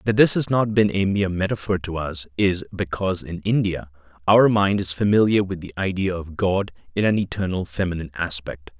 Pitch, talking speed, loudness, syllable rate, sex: 95 Hz, 190 wpm, -22 LUFS, 5.5 syllables/s, male